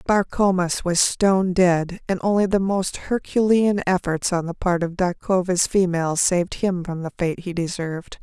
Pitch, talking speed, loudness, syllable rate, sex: 180 Hz, 180 wpm, -21 LUFS, 4.8 syllables/s, female